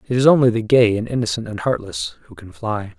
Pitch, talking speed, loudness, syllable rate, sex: 110 Hz, 240 wpm, -19 LUFS, 5.8 syllables/s, male